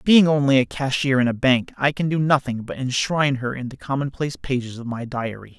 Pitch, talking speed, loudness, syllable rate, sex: 135 Hz, 225 wpm, -21 LUFS, 5.6 syllables/s, male